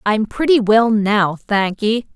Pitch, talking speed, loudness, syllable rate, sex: 215 Hz, 165 wpm, -16 LUFS, 3.5 syllables/s, female